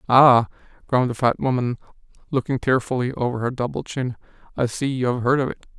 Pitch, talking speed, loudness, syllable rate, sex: 125 Hz, 185 wpm, -22 LUFS, 6.1 syllables/s, male